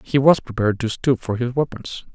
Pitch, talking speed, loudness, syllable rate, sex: 125 Hz, 225 wpm, -20 LUFS, 5.5 syllables/s, male